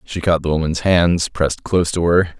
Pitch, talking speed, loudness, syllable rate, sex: 85 Hz, 225 wpm, -17 LUFS, 5.5 syllables/s, male